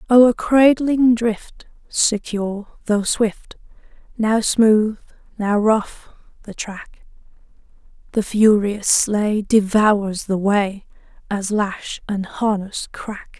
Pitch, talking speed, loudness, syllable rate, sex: 215 Hz, 105 wpm, -18 LUFS, 3.0 syllables/s, female